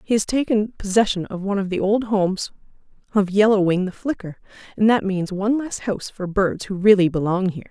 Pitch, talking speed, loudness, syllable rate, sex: 200 Hz, 210 wpm, -20 LUFS, 6.0 syllables/s, female